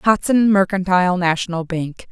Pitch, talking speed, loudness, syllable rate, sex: 185 Hz, 115 wpm, -17 LUFS, 4.9 syllables/s, female